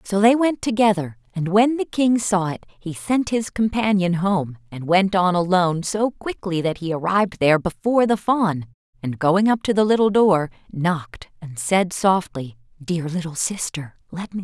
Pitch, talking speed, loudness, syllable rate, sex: 185 Hz, 185 wpm, -20 LUFS, 4.8 syllables/s, female